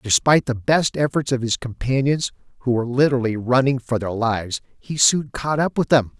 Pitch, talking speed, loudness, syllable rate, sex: 125 Hz, 195 wpm, -20 LUFS, 5.5 syllables/s, male